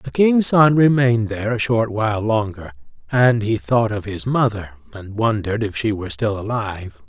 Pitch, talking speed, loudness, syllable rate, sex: 115 Hz, 185 wpm, -18 LUFS, 5.1 syllables/s, male